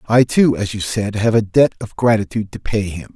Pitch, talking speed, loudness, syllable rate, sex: 110 Hz, 245 wpm, -17 LUFS, 5.4 syllables/s, male